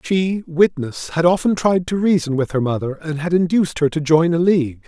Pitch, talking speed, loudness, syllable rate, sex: 165 Hz, 220 wpm, -18 LUFS, 5.3 syllables/s, male